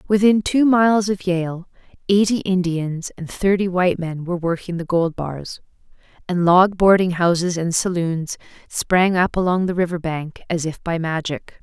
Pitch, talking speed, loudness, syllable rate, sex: 180 Hz, 165 wpm, -19 LUFS, 4.6 syllables/s, female